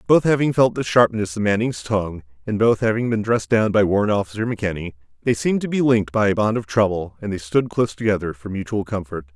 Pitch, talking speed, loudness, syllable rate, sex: 105 Hz, 230 wpm, -20 LUFS, 6.5 syllables/s, male